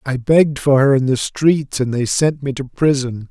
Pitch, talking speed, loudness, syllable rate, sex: 135 Hz, 235 wpm, -16 LUFS, 4.7 syllables/s, male